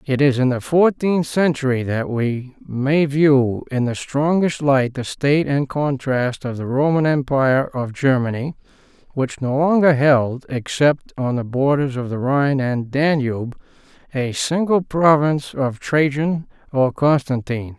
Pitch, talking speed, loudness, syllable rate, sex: 135 Hz, 150 wpm, -19 LUFS, 4.3 syllables/s, male